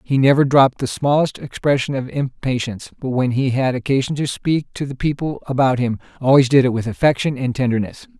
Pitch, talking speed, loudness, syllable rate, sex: 135 Hz, 200 wpm, -18 LUFS, 5.8 syllables/s, male